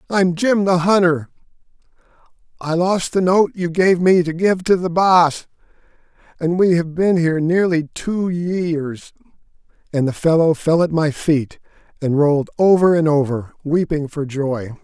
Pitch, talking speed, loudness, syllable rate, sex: 165 Hz, 160 wpm, -17 LUFS, 4.3 syllables/s, male